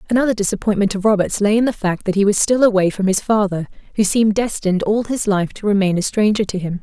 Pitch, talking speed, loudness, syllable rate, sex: 205 Hz, 245 wpm, -17 LUFS, 6.5 syllables/s, female